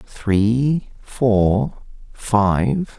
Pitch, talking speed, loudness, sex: 115 Hz, 60 wpm, -19 LUFS, male